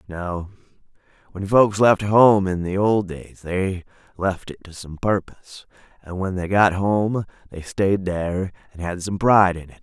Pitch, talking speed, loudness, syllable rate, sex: 95 Hz, 175 wpm, -20 LUFS, 4.4 syllables/s, male